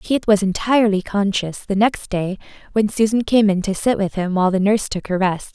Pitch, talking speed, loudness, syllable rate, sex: 200 Hz, 225 wpm, -18 LUFS, 5.5 syllables/s, female